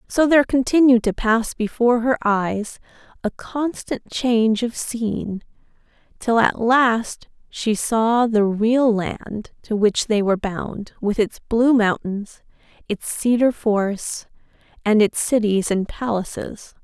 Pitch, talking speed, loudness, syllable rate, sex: 225 Hz, 135 wpm, -20 LUFS, 3.8 syllables/s, female